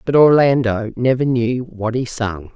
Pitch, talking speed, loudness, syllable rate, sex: 120 Hz, 165 wpm, -17 LUFS, 4.2 syllables/s, female